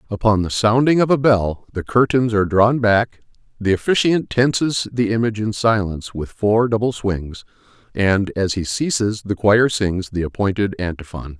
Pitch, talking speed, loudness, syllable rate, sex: 105 Hz, 170 wpm, -18 LUFS, 4.8 syllables/s, male